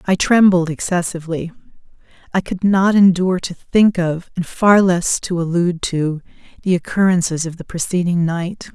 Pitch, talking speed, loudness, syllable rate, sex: 180 Hz, 150 wpm, -17 LUFS, 4.9 syllables/s, female